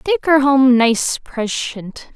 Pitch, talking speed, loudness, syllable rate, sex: 260 Hz, 140 wpm, -15 LUFS, 3.1 syllables/s, female